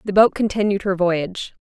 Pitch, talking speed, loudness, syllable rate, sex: 195 Hz, 185 wpm, -19 LUFS, 5.5 syllables/s, female